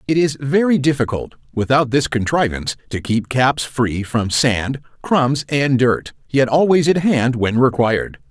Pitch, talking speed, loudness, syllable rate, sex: 130 Hz, 160 wpm, -17 LUFS, 4.3 syllables/s, male